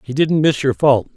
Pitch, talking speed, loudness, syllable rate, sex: 135 Hz, 260 wpm, -16 LUFS, 4.9 syllables/s, male